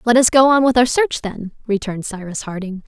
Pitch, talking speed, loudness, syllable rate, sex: 225 Hz, 230 wpm, -17 LUFS, 5.7 syllables/s, female